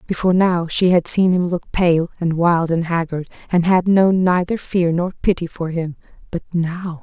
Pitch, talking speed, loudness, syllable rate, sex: 175 Hz, 195 wpm, -18 LUFS, 4.6 syllables/s, female